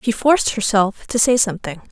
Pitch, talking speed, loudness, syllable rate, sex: 220 Hz, 190 wpm, -17 LUFS, 5.7 syllables/s, female